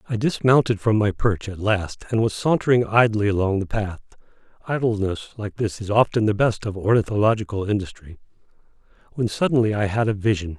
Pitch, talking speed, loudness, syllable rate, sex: 105 Hz, 170 wpm, -21 LUFS, 3.8 syllables/s, male